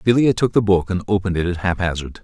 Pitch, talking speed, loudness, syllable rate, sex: 95 Hz, 240 wpm, -19 LUFS, 6.6 syllables/s, male